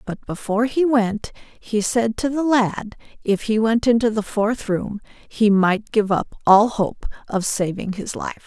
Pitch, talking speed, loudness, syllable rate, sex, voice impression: 220 Hz, 185 wpm, -20 LUFS, 4.0 syllables/s, female, feminine, slightly young, slightly adult-like, slightly thin, tensed, slightly powerful, bright, slightly hard, clear, fluent, slightly cool, intellectual, slightly refreshing, sincere, slightly calm, slightly friendly, slightly reassuring, slightly elegant, lively, slightly strict